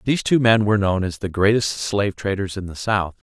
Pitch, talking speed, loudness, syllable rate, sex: 100 Hz, 235 wpm, -20 LUFS, 5.9 syllables/s, male